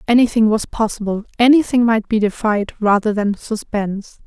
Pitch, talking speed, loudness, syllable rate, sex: 220 Hz, 140 wpm, -17 LUFS, 5.1 syllables/s, female